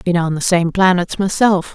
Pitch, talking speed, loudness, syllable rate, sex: 180 Hz, 205 wpm, -15 LUFS, 4.9 syllables/s, female